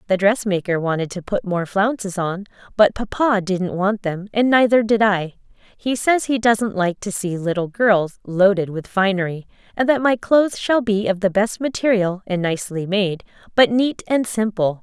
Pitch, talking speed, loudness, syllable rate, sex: 200 Hz, 185 wpm, -19 LUFS, 4.7 syllables/s, female